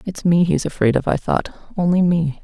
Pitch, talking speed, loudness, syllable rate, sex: 170 Hz, 220 wpm, -18 LUFS, 5.1 syllables/s, female